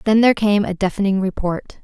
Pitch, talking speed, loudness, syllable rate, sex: 200 Hz, 195 wpm, -18 LUFS, 5.9 syllables/s, female